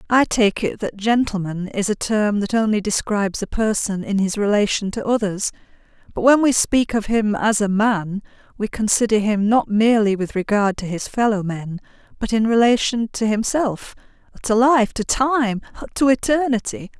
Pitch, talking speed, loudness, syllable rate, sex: 215 Hz, 160 wpm, -19 LUFS, 4.8 syllables/s, female